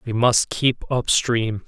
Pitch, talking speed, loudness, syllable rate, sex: 115 Hz, 145 wpm, -20 LUFS, 3.2 syllables/s, male